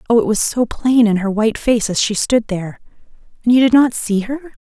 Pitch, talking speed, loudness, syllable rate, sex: 225 Hz, 245 wpm, -16 LUFS, 5.9 syllables/s, female